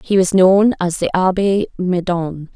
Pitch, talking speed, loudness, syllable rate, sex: 185 Hz, 165 wpm, -15 LUFS, 4.0 syllables/s, female